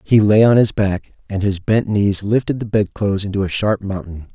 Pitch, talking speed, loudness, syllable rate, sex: 100 Hz, 235 wpm, -17 LUFS, 5.1 syllables/s, male